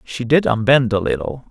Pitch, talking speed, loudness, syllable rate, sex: 120 Hz, 200 wpm, -17 LUFS, 5.1 syllables/s, male